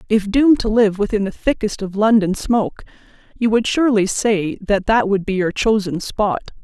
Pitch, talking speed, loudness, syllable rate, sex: 210 Hz, 190 wpm, -17 LUFS, 5.1 syllables/s, female